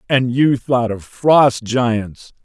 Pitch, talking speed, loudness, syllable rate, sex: 120 Hz, 150 wpm, -16 LUFS, 2.8 syllables/s, male